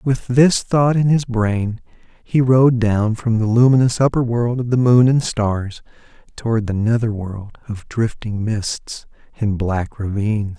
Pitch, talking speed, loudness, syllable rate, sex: 115 Hz, 165 wpm, -17 LUFS, 4.0 syllables/s, male